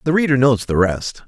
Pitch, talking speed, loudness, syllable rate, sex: 130 Hz, 235 wpm, -17 LUFS, 5.3 syllables/s, male